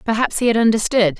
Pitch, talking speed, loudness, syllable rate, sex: 220 Hz, 200 wpm, -17 LUFS, 6.5 syllables/s, female